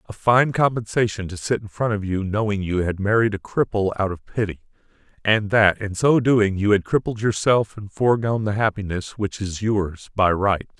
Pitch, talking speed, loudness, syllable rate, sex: 105 Hz, 200 wpm, -21 LUFS, 5.1 syllables/s, male